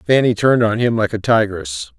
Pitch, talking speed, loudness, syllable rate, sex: 115 Hz, 210 wpm, -16 LUFS, 5.5 syllables/s, male